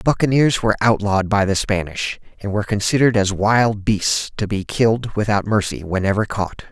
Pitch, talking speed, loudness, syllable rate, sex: 105 Hz, 170 wpm, -18 LUFS, 5.5 syllables/s, male